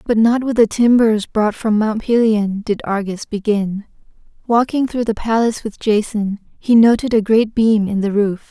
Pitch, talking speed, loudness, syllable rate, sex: 215 Hz, 185 wpm, -16 LUFS, 4.6 syllables/s, female